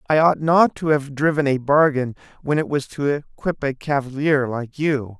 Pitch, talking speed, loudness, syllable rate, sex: 140 Hz, 195 wpm, -20 LUFS, 4.7 syllables/s, male